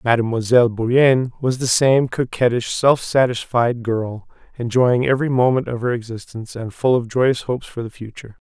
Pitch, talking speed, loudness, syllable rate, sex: 120 Hz, 165 wpm, -18 LUFS, 5.4 syllables/s, male